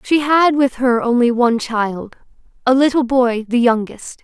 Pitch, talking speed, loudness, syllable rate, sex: 250 Hz, 170 wpm, -15 LUFS, 4.4 syllables/s, female